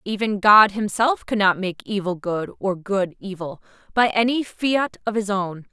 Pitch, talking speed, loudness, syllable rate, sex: 205 Hz, 170 wpm, -21 LUFS, 4.3 syllables/s, female